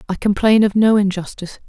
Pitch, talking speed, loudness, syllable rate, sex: 205 Hz, 180 wpm, -15 LUFS, 6.2 syllables/s, female